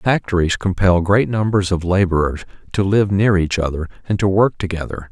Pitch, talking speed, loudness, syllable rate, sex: 95 Hz, 175 wpm, -17 LUFS, 5.2 syllables/s, male